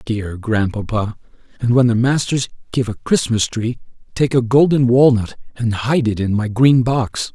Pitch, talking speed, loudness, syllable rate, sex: 120 Hz, 170 wpm, -17 LUFS, 4.4 syllables/s, male